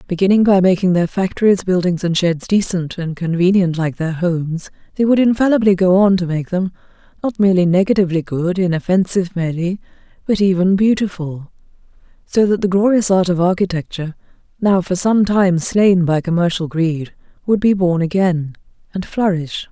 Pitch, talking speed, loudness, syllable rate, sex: 180 Hz, 160 wpm, -16 LUFS, 5.4 syllables/s, female